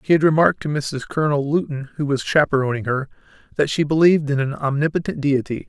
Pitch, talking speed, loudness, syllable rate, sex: 145 Hz, 190 wpm, -20 LUFS, 6.5 syllables/s, male